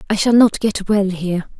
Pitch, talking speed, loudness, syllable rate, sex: 200 Hz, 225 wpm, -16 LUFS, 5.3 syllables/s, female